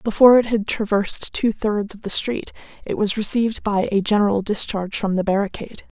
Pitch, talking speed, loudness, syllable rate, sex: 210 Hz, 190 wpm, -20 LUFS, 5.8 syllables/s, female